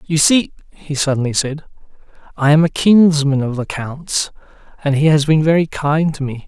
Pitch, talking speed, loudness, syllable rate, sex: 150 Hz, 185 wpm, -16 LUFS, 4.9 syllables/s, male